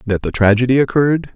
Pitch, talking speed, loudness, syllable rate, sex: 125 Hz, 175 wpm, -15 LUFS, 6.5 syllables/s, male